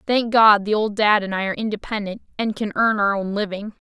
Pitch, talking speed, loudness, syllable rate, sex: 210 Hz, 230 wpm, -20 LUFS, 5.8 syllables/s, female